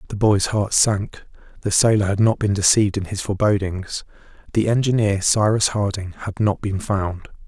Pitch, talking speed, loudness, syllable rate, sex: 100 Hz, 170 wpm, -20 LUFS, 5.0 syllables/s, male